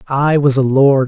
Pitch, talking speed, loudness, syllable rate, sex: 135 Hz, 225 wpm, -13 LUFS, 4.1 syllables/s, male